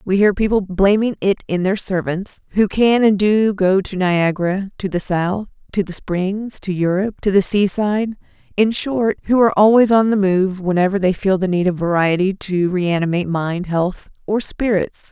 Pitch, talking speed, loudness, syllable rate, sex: 195 Hz, 185 wpm, -17 LUFS, 4.8 syllables/s, female